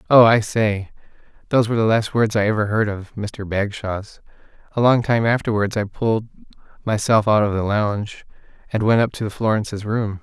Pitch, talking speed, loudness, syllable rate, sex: 110 Hz, 180 wpm, -20 LUFS, 5.5 syllables/s, male